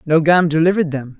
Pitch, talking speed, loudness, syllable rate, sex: 160 Hz, 150 wpm, -15 LUFS, 6.4 syllables/s, female